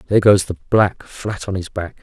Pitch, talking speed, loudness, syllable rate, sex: 95 Hz, 240 wpm, -18 LUFS, 5.3 syllables/s, male